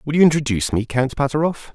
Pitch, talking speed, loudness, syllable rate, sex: 135 Hz, 205 wpm, -19 LUFS, 6.4 syllables/s, male